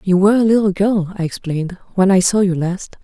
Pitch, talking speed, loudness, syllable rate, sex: 190 Hz, 240 wpm, -16 LUFS, 6.0 syllables/s, female